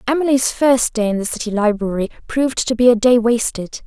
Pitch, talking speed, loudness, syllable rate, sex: 235 Hz, 200 wpm, -17 LUFS, 5.7 syllables/s, female